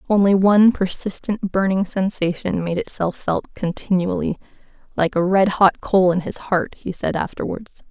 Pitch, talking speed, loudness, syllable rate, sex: 185 Hz, 150 wpm, -19 LUFS, 4.8 syllables/s, female